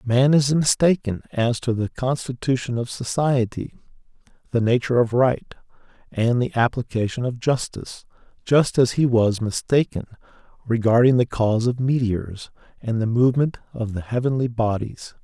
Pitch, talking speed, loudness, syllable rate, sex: 120 Hz, 140 wpm, -21 LUFS, 4.9 syllables/s, male